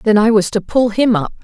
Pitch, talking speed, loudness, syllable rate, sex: 215 Hz, 295 wpm, -14 LUFS, 5.3 syllables/s, female